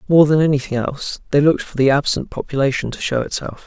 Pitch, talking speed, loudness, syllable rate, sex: 140 Hz, 215 wpm, -18 LUFS, 6.5 syllables/s, male